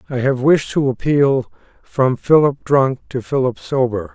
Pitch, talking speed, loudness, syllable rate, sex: 135 Hz, 160 wpm, -17 LUFS, 4.1 syllables/s, male